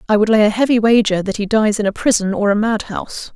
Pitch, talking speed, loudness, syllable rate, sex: 215 Hz, 270 wpm, -16 LUFS, 6.3 syllables/s, female